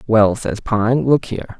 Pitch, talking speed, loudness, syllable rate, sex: 115 Hz, 190 wpm, -17 LUFS, 4.4 syllables/s, male